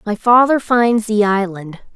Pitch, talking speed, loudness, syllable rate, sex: 215 Hz, 155 wpm, -14 LUFS, 4.1 syllables/s, female